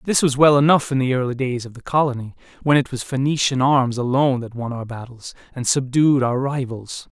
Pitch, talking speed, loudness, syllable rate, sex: 130 Hz, 210 wpm, -19 LUFS, 5.5 syllables/s, male